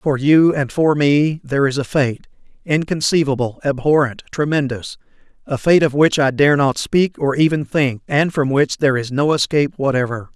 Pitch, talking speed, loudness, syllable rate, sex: 140 Hz, 170 wpm, -17 LUFS, 5.0 syllables/s, male